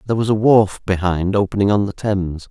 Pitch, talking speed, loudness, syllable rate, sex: 100 Hz, 215 wpm, -17 LUFS, 6.0 syllables/s, male